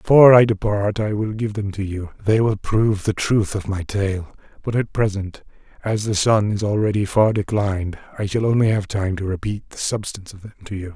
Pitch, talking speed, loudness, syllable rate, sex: 105 Hz, 220 wpm, -20 LUFS, 5.4 syllables/s, male